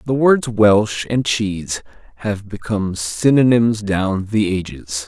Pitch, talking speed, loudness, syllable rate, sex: 105 Hz, 130 wpm, -18 LUFS, 3.8 syllables/s, male